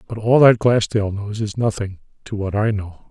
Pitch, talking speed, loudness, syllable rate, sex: 105 Hz, 195 wpm, -18 LUFS, 5.3 syllables/s, male